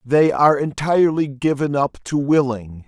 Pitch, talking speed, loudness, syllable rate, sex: 140 Hz, 145 wpm, -18 LUFS, 4.8 syllables/s, male